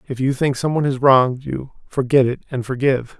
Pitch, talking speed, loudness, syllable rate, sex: 130 Hz, 205 wpm, -19 LUFS, 5.8 syllables/s, male